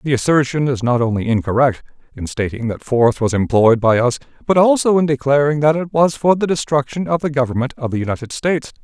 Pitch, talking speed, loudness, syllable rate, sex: 135 Hz, 210 wpm, -16 LUFS, 6.1 syllables/s, male